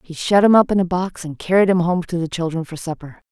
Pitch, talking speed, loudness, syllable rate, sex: 175 Hz, 290 wpm, -18 LUFS, 6.1 syllables/s, female